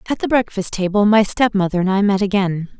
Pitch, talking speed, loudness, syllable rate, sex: 200 Hz, 215 wpm, -17 LUFS, 6.0 syllables/s, female